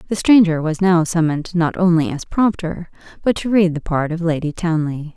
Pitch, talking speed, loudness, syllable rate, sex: 170 Hz, 200 wpm, -17 LUFS, 5.2 syllables/s, female